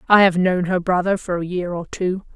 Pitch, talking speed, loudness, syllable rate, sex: 180 Hz, 255 wpm, -20 LUFS, 5.2 syllables/s, female